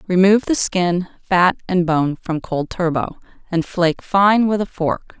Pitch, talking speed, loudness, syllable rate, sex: 180 Hz, 175 wpm, -18 LUFS, 4.2 syllables/s, female